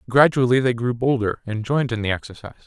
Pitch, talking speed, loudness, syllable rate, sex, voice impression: 120 Hz, 200 wpm, -20 LUFS, 7.0 syllables/s, male, very masculine, adult-like, slightly middle-aged, slightly thick, slightly tensed, slightly weak, slightly dark, very hard, slightly muffled, slightly halting, slightly raspy, slightly cool, slightly intellectual, sincere, slightly calm, slightly mature, slightly friendly, slightly reassuring, unique, slightly wild, modest